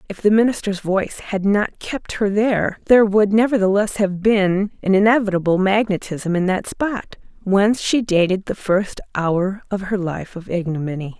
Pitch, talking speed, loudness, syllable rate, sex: 200 Hz, 165 wpm, -19 LUFS, 4.9 syllables/s, female